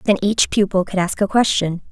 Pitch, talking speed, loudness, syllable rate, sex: 195 Hz, 220 wpm, -18 LUFS, 5.5 syllables/s, female